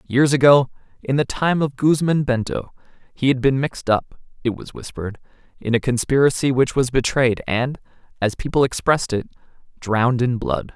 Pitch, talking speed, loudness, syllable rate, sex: 130 Hz, 165 wpm, -20 LUFS, 5.2 syllables/s, male